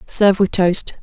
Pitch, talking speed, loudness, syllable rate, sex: 190 Hz, 175 wpm, -15 LUFS, 4.9 syllables/s, female